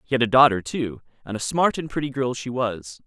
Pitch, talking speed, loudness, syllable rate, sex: 120 Hz, 255 wpm, -22 LUFS, 5.6 syllables/s, male